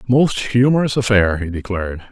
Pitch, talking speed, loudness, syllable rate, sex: 110 Hz, 140 wpm, -17 LUFS, 5.4 syllables/s, male